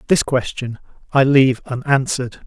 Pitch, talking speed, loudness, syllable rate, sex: 130 Hz, 120 wpm, -17 LUFS, 5.4 syllables/s, male